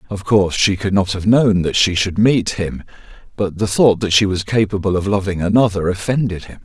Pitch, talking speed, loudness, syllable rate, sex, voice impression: 100 Hz, 215 wpm, -16 LUFS, 5.4 syllables/s, male, masculine, middle-aged, thick, powerful, soft, slightly muffled, raspy, intellectual, mature, slightly friendly, reassuring, wild, slightly lively, kind